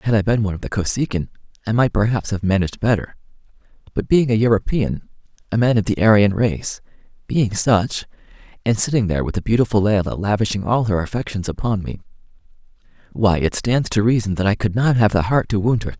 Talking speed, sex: 205 wpm, male